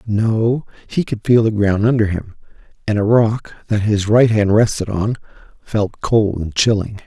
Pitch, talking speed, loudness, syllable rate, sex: 105 Hz, 180 wpm, -17 LUFS, 4.3 syllables/s, male